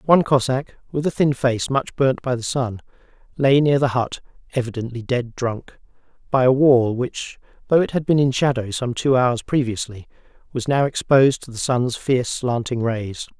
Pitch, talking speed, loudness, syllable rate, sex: 130 Hz, 185 wpm, -20 LUFS, 4.9 syllables/s, male